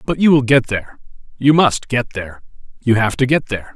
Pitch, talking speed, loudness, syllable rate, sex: 130 Hz, 225 wpm, -16 LUFS, 5.9 syllables/s, male